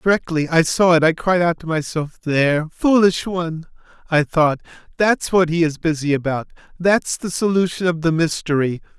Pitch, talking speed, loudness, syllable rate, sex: 165 Hz, 175 wpm, -18 LUFS, 5.0 syllables/s, male